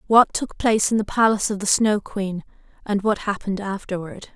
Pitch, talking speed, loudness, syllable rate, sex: 205 Hz, 195 wpm, -21 LUFS, 5.6 syllables/s, female